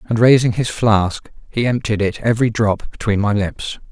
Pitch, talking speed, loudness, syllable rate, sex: 110 Hz, 185 wpm, -17 LUFS, 4.8 syllables/s, male